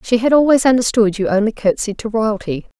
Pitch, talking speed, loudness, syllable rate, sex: 225 Hz, 195 wpm, -16 LUFS, 5.8 syllables/s, female